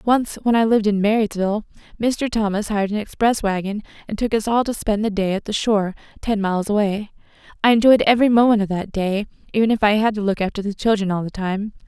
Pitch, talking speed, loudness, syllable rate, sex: 210 Hz, 225 wpm, -19 LUFS, 6.4 syllables/s, female